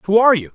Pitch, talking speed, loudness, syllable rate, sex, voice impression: 200 Hz, 330 wpm, -14 LUFS, 7.8 syllables/s, male, very masculine, very adult-like, slightly old, very thick, tensed, very powerful, bright, slightly soft, clear, fluent, slightly raspy, very cool, intellectual, slightly refreshing, sincere, very calm, very mature, very friendly, very reassuring, very unique, elegant, wild, slightly sweet, lively, kind